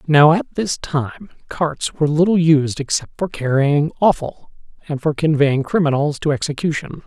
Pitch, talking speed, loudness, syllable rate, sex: 155 Hz, 155 wpm, -18 LUFS, 4.7 syllables/s, male